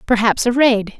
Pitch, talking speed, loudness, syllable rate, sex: 230 Hz, 180 wpm, -15 LUFS, 4.7 syllables/s, female